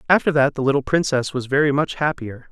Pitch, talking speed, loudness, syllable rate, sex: 140 Hz, 215 wpm, -19 LUFS, 6.1 syllables/s, male